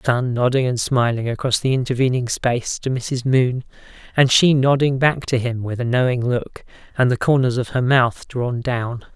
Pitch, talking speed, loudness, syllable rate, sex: 125 Hz, 190 wpm, -19 LUFS, 4.8 syllables/s, male